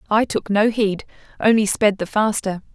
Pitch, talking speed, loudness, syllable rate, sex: 210 Hz, 155 wpm, -19 LUFS, 4.8 syllables/s, female